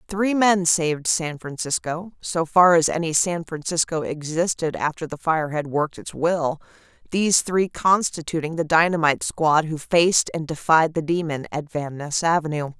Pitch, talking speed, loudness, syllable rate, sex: 165 Hz, 165 wpm, -21 LUFS, 4.8 syllables/s, female